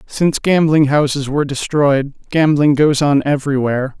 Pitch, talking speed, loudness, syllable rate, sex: 145 Hz, 135 wpm, -15 LUFS, 5.2 syllables/s, male